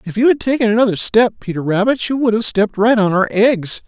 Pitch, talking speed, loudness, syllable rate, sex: 215 Hz, 250 wpm, -15 LUFS, 6.0 syllables/s, male